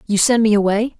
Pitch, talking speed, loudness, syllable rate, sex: 215 Hz, 240 wpm, -15 LUFS, 6.0 syllables/s, female